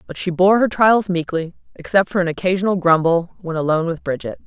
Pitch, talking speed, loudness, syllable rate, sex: 175 Hz, 200 wpm, -18 LUFS, 6.0 syllables/s, female